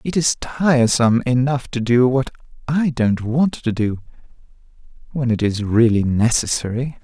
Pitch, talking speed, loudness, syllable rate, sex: 125 Hz, 145 wpm, -18 LUFS, 4.6 syllables/s, male